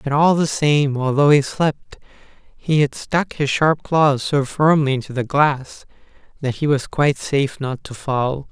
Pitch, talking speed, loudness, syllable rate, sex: 140 Hz, 185 wpm, -18 LUFS, 4.1 syllables/s, male